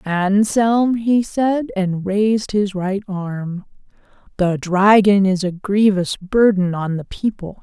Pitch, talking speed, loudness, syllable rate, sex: 200 Hz, 135 wpm, -17 LUFS, 3.4 syllables/s, female